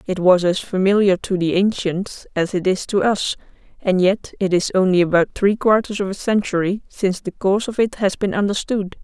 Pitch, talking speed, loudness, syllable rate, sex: 195 Hz, 205 wpm, -19 LUFS, 5.2 syllables/s, female